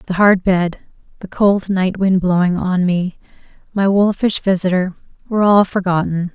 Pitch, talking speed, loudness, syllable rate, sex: 185 Hz, 150 wpm, -16 LUFS, 4.6 syllables/s, female